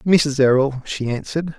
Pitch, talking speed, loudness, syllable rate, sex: 145 Hz, 150 wpm, -19 LUFS, 4.9 syllables/s, male